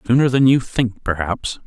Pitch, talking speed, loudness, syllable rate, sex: 115 Hz, 180 wpm, -18 LUFS, 4.6 syllables/s, male